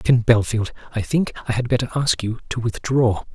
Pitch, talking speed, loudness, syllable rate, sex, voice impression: 120 Hz, 195 wpm, -21 LUFS, 5.5 syllables/s, male, masculine, slightly middle-aged, tensed, powerful, slightly hard, fluent, slightly raspy, cool, intellectual, calm, mature, reassuring, wild, lively, slightly kind, slightly modest